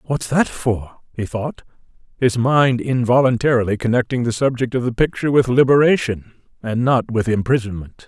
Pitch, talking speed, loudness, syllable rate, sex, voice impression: 125 Hz, 150 wpm, -18 LUFS, 5.3 syllables/s, male, very masculine, very adult-like, slightly old, very thick, slightly tensed, slightly weak, slightly bright, slightly soft, clear, fluent, slightly raspy, cool, very intellectual, slightly refreshing, sincere, slightly calm, mature, friendly, reassuring, very unique, slightly elegant, slightly wild, sweet, lively, kind, slightly modest